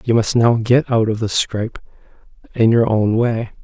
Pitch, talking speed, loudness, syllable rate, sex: 115 Hz, 200 wpm, -16 LUFS, 4.9 syllables/s, male